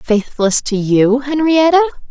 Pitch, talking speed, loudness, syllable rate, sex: 260 Hz, 115 wpm, -13 LUFS, 3.8 syllables/s, female